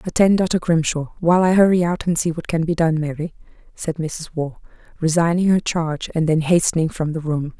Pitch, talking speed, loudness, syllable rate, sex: 165 Hz, 205 wpm, -19 LUFS, 5.6 syllables/s, female